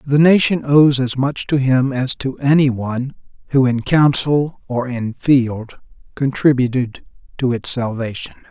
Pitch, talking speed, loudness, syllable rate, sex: 130 Hz, 150 wpm, -17 LUFS, 4.2 syllables/s, male